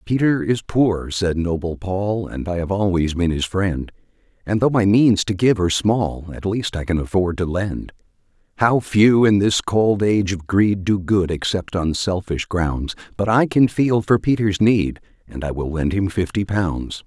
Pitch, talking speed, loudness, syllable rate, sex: 95 Hz, 195 wpm, -19 LUFS, 4.3 syllables/s, male